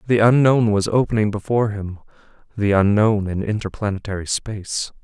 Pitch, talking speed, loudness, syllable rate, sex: 105 Hz, 130 wpm, -19 LUFS, 5.5 syllables/s, male